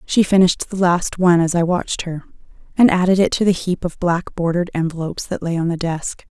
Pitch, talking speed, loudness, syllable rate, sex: 175 Hz, 230 wpm, -18 LUFS, 6.1 syllables/s, female